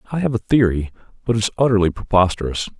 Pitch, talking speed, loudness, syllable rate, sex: 105 Hz, 195 wpm, -19 LUFS, 7.4 syllables/s, male